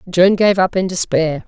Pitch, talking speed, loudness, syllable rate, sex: 180 Hz, 205 wpm, -15 LUFS, 4.6 syllables/s, female